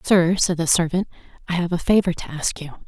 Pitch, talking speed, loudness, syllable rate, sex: 170 Hz, 230 wpm, -21 LUFS, 5.6 syllables/s, female